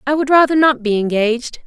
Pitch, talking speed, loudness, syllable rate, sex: 260 Hz, 215 wpm, -15 LUFS, 6.0 syllables/s, female